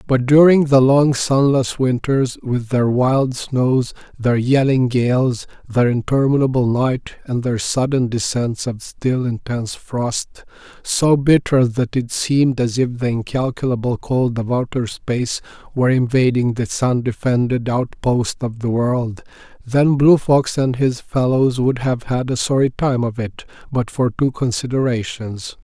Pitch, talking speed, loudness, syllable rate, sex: 125 Hz, 145 wpm, -18 LUFS, 4.1 syllables/s, male